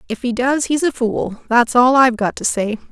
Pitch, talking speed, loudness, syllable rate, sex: 245 Hz, 245 wpm, -16 LUFS, 5.1 syllables/s, female